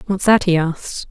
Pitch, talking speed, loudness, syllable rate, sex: 180 Hz, 215 wpm, -16 LUFS, 5.3 syllables/s, female